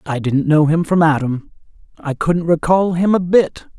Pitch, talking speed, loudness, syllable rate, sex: 165 Hz, 190 wpm, -16 LUFS, 4.5 syllables/s, male